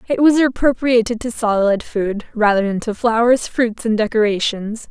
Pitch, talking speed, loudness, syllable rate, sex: 225 Hz, 160 wpm, -17 LUFS, 4.8 syllables/s, female